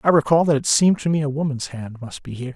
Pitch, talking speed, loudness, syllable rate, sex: 145 Hz, 305 wpm, -19 LUFS, 7.1 syllables/s, male